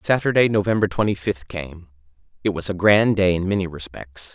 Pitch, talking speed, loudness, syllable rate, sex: 95 Hz, 180 wpm, -20 LUFS, 5.5 syllables/s, male